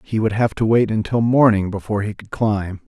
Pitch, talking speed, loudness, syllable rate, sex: 105 Hz, 225 wpm, -19 LUFS, 5.5 syllables/s, male